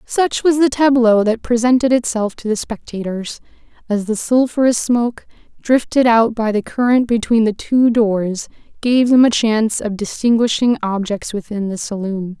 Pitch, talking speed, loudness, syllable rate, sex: 225 Hz, 160 wpm, -16 LUFS, 4.7 syllables/s, female